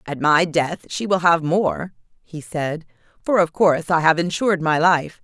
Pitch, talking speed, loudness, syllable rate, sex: 165 Hz, 195 wpm, -19 LUFS, 4.5 syllables/s, female